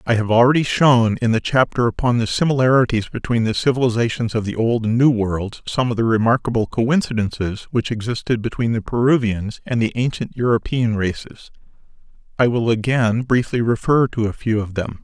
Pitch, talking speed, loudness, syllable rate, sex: 115 Hz, 175 wpm, -19 LUFS, 5.4 syllables/s, male